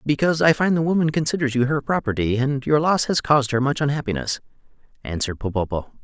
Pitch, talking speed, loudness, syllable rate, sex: 135 Hz, 190 wpm, -21 LUFS, 6.5 syllables/s, male